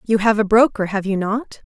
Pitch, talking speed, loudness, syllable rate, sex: 210 Hz, 245 wpm, -18 LUFS, 5.3 syllables/s, female